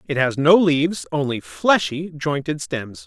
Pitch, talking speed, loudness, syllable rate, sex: 140 Hz, 155 wpm, -20 LUFS, 4.2 syllables/s, male